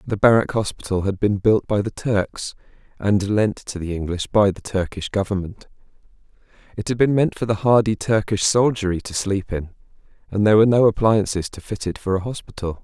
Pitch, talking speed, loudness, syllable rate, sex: 105 Hz, 190 wpm, -20 LUFS, 5.5 syllables/s, male